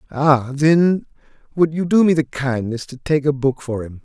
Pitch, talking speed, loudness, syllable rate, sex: 145 Hz, 210 wpm, -18 LUFS, 4.6 syllables/s, male